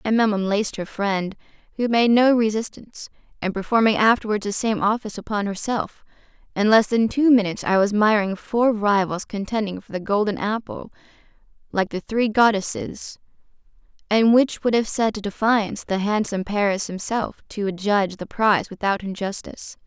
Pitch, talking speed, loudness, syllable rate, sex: 210 Hz, 160 wpm, -21 LUFS, 5.4 syllables/s, female